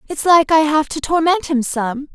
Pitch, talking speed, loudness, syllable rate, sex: 295 Hz, 225 wpm, -16 LUFS, 4.6 syllables/s, female